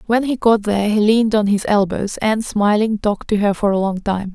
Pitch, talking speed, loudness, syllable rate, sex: 210 Hz, 250 wpm, -17 LUFS, 5.5 syllables/s, female